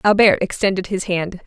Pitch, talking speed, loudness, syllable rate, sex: 190 Hz, 165 wpm, -18 LUFS, 5.3 syllables/s, female